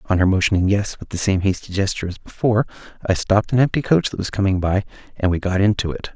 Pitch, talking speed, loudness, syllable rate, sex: 100 Hz, 245 wpm, -20 LUFS, 6.8 syllables/s, male